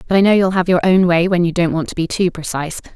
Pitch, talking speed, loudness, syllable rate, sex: 175 Hz, 325 wpm, -15 LUFS, 6.8 syllables/s, female